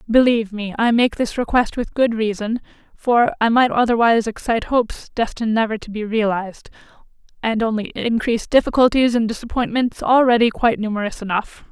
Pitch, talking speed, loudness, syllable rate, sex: 225 Hz, 155 wpm, -19 LUFS, 5.8 syllables/s, female